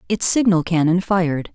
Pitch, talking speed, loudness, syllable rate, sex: 175 Hz, 155 wpm, -18 LUFS, 5.1 syllables/s, female